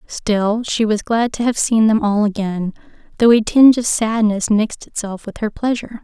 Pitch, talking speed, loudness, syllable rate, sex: 220 Hz, 200 wpm, -16 LUFS, 5.0 syllables/s, female